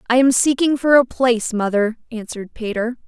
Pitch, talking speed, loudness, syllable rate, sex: 240 Hz, 175 wpm, -17 LUFS, 5.6 syllables/s, female